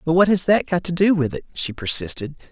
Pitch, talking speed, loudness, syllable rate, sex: 165 Hz, 260 wpm, -20 LUFS, 5.9 syllables/s, male